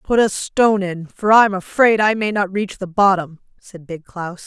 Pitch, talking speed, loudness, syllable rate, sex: 195 Hz, 230 wpm, -17 LUFS, 4.8 syllables/s, female